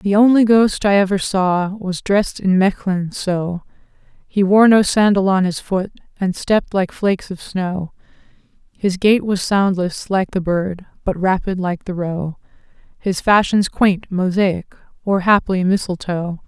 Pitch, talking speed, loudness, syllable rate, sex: 190 Hz, 155 wpm, -17 LUFS, 4.2 syllables/s, female